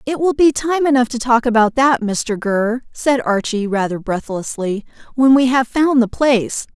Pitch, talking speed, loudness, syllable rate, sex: 245 Hz, 185 wpm, -16 LUFS, 4.6 syllables/s, female